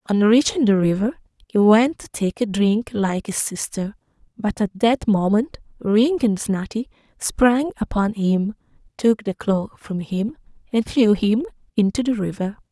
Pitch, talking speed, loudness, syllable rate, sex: 220 Hz, 160 wpm, -20 LUFS, 4.2 syllables/s, female